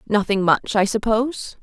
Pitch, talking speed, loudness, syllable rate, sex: 215 Hz, 150 wpm, -20 LUFS, 4.9 syllables/s, female